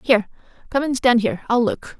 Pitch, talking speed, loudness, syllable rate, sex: 240 Hz, 210 wpm, -20 LUFS, 6.2 syllables/s, female